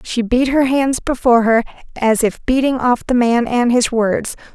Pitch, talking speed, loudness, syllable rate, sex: 245 Hz, 200 wpm, -15 LUFS, 4.5 syllables/s, female